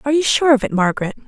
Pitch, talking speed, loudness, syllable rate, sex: 250 Hz, 280 wpm, -16 LUFS, 8.4 syllables/s, female